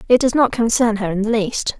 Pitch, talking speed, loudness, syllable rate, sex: 225 Hz, 270 wpm, -17 LUFS, 5.6 syllables/s, female